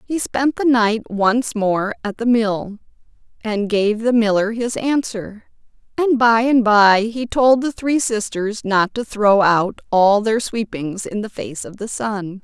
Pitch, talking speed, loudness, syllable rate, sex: 220 Hz, 180 wpm, -18 LUFS, 3.7 syllables/s, female